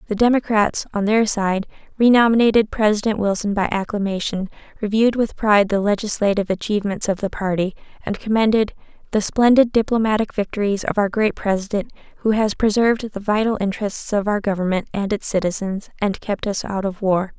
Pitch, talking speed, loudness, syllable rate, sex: 210 Hz, 160 wpm, -19 LUFS, 5.8 syllables/s, female